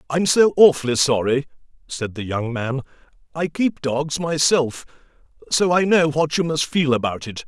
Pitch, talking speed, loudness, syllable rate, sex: 145 Hz, 170 wpm, -19 LUFS, 4.6 syllables/s, male